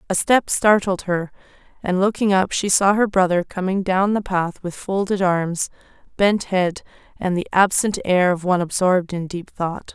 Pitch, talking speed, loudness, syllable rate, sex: 185 Hz, 180 wpm, -20 LUFS, 4.7 syllables/s, female